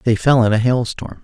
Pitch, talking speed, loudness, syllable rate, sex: 115 Hz, 245 wpm, -16 LUFS, 5.4 syllables/s, male